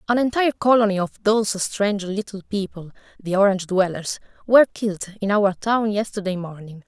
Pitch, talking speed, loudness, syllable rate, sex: 200 Hz, 155 wpm, -21 LUFS, 5.7 syllables/s, female